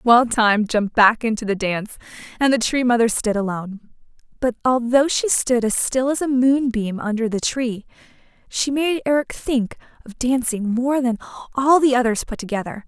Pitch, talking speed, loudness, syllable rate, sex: 240 Hz, 175 wpm, -19 LUFS, 5.1 syllables/s, female